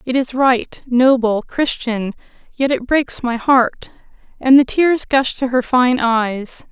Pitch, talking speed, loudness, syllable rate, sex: 250 Hz, 160 wpm, -16 LUFS, 3.5 syllables/s, female